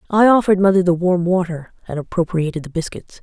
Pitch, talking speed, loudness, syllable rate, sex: 180 Hz, 185 wpm, -17 LUFS, 6.3 syllables/s, female